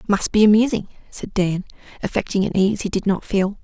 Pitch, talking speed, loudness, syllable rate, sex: 200 Hz, 200 wpm, -20 LUFS, 5.6 syllables/s, female